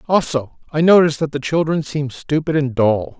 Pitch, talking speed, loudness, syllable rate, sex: 145 Hz, 190 wpm, -17 LUFS, 5.1 syllables/s, male